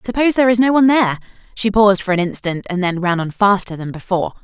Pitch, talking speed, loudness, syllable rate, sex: 205 Hz, 245 wpm, -16 LUFS, 7.2 syllables/s, female